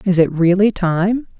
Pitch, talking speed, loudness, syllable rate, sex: 190 Hz, 170 wpm, -15 LUFS, 4.2 syllables/s, female